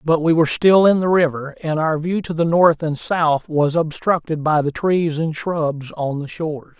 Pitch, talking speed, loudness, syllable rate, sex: 160 Hz, 220 wpm, -18 LUFS, 4.5 syllables/s, male